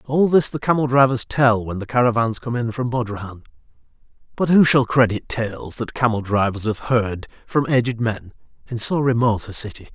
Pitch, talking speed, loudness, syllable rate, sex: 120 Hz, 185 wpm, -19 LUFS, 5.3 syllables/s, male